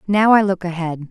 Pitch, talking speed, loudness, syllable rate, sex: 185 Hz, 220 wpm, -17 LUFS, 5.2 syllables/s, female